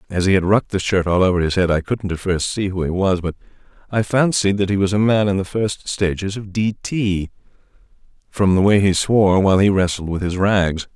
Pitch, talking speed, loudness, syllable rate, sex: 95 Hz, 240 wpm, -18 LUFS, 5.6 syllables/s, male